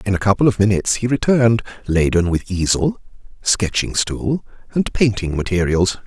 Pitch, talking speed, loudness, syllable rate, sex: 105 Hz, 150 wpm, -18 LUFS, 5.1 syllables/s, male